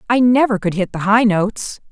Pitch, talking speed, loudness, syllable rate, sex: 215 Hz, 220 wpm, -16 LUFS, 5.4 syllables/s, female